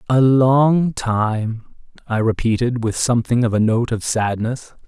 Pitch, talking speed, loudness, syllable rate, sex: 120 Hz, 150 wpm, -18 LUFS, 4.1 syllables/s, male